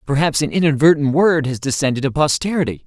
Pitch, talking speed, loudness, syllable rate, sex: 150 Hz, 170 wpm, -17 LUFS, 6.2 syllables/s, male